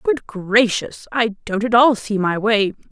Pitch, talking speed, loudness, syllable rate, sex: 220 Hz, 185 wpm, -18 LUFS, 4.0 syllables/s, female